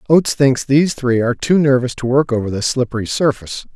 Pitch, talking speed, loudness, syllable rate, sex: 130 Hz, 210 wpm, -16 LUFS, 6.3 syllables/s, male